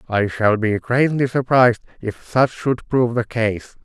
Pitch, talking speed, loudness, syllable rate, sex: 120 Hz, 170 wpm, -18 LUFS, 4.4 syllables/s, male